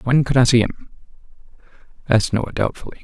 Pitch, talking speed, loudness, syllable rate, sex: 120 Hz, 160 wpm, -18 LUFS, 6.3 syllables/s, male